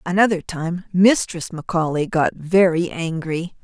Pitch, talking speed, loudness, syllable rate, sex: 170 Hz, 115 wpm, -20 LUFS, 4.4 syllables/s, female